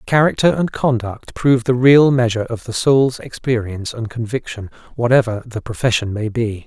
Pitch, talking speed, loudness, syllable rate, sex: 120 Hz, 160 wpm, -17 LUFS, 5.3 syllables/s, male